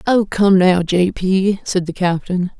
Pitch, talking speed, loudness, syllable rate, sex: 185 Hz, 185 wpm, -16 LUFS, 3.8 syllables/s, female